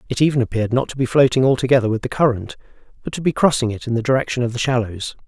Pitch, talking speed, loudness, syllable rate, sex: 125 Hz, 250 wpm, -19 LUFS, 7.5 syllables/s, male